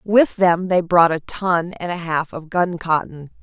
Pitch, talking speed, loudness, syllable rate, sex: 175 Hz, 190 wpm, -19 LUFS, 4.0 syllables/s, female